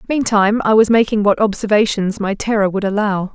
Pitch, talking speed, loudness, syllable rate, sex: 210 Hz, 180 wpm, -15 LUFS, 5.7 syllables/s, female